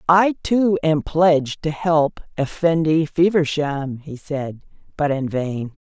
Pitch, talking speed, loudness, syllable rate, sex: 155 Hz, 135 wpm, -20 LUFS, 3.7 syllables/s, female